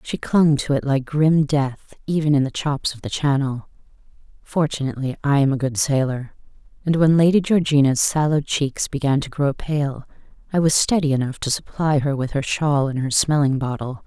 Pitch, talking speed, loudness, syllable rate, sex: 145 Hz, 190 wpm, -20 LUFS, 5.0 syllables/s, female